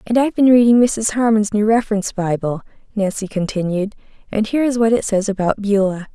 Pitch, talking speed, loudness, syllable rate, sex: 210 Hz, 185 wpm, -17 LUFS, 6.1 syllables/s, female